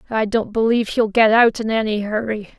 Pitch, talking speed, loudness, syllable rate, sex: 220 Hz, 210 wpm, -18 LUFS, 5.5 syllables/s, female